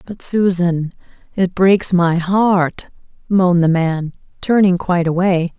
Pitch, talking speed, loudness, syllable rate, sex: 180 Hz, 130 wpm, -15 LUFS, 3.9 syllables/s, female